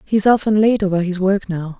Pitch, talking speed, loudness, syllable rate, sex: 195 Hz, 235 wpm, -17 LUFS, 5.3 syllables/s, female